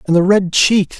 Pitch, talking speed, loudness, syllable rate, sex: 190 Hz, 240 wpm, -13 LUFS, 4.5 syllables/s, male